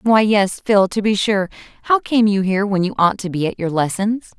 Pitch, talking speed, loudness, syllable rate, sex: 200 Hz, 245 wpm, -17 LUFS, 5.3 syllables/s, female